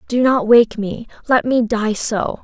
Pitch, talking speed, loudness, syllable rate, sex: 230 Hz, 175 wpm, -16 LUFS, 3.8 syllables/s, female